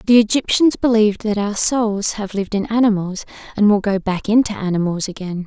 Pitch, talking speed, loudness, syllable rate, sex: 210 Hz, 185 wpm, -17 LUFS, 5.6 syllables/s, female